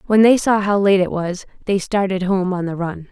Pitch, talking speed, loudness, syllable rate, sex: 190 Hz, 250 wpm, -18 LUFS, 5.1 syllables/s, female